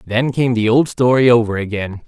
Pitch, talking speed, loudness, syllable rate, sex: 115 Hz, 205 wpm, -15 LUFS, 5.2 syllables/s, male